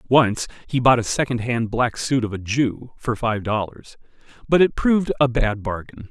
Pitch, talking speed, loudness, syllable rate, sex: 120 Hz, 185 wpm, -21 LUFS, 4.7 syllables/s, male